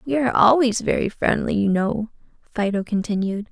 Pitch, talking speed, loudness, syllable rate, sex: 215 Hz, 155 wpm, -20 LUFS, 5.4 syllables/s, female